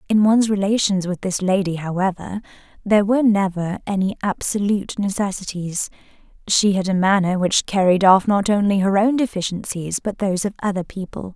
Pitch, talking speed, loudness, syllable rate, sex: 195 Hz, 160 wpm, -19 LUFS, 5.6 syllables/s, female